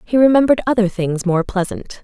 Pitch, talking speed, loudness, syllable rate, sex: 210 Hz, 175 wpm, -16 LUFS, 5.9 syllables/s, female